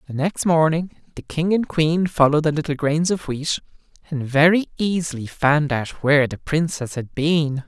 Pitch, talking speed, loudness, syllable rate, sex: 155 Hz, 180 wpm, -20 LUFS, 4.8 syllables/s, male